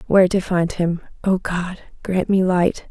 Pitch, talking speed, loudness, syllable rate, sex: 180 Hz, 165 wpm, -20 LUFS, 4.4 syllables/s, female